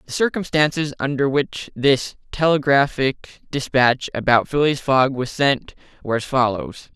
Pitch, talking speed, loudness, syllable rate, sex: 135 Hz, 130 wpm, -19 LUFS, 4.5 syllables/s, male